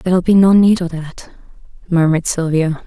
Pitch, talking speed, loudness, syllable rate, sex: 175 Hz, 165 wpm, -14 LUFS, 5.4 syllables/s, female